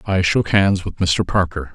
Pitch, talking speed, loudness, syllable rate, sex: 90 Hz, 205 wpm, -18 LUFS, 4.4 syllables/s, male